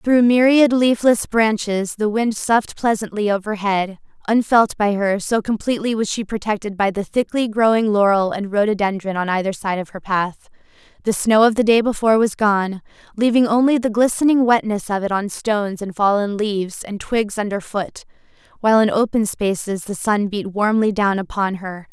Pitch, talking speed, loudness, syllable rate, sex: 210 Hz, 175 wpm, -18 LUFS, 5.1 syllables/s, female